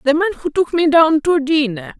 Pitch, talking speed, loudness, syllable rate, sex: 305 Hz, 240 wpm, -15 LUFS, 5.4 syllables/s, female